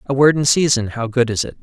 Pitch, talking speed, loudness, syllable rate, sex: 125 Hz, 295 wpm, -16 LUFS, 6.0 syllables/s, male